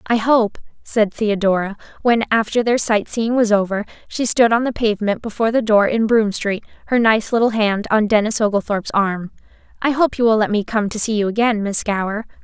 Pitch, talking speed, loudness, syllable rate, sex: 215 Hz, 205 wpm, -18 LUFS, 5.6 syllables/s, female